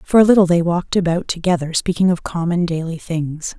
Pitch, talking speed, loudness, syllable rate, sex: 170 Hz, 200 wpm, -17 LUFS, 5.8 syllables/s, female